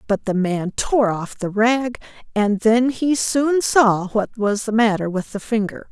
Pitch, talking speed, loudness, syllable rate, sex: 220 Hz, 195 wpm, -19 LUFS, 4.0 syllables/s, female